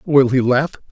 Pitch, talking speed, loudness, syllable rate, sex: 135 Hz, 195 wpm, -16 LUFS, 4.6 syllables/s, male